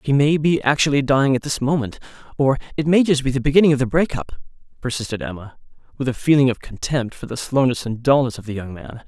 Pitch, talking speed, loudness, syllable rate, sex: 135 Hz, 225 wpm, -19 LUFS, 6.4 syllables/s, male